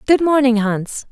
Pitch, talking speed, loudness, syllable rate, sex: 250 Hz, 160 wpm, -16 LUFS, 4.3 syllables/s, female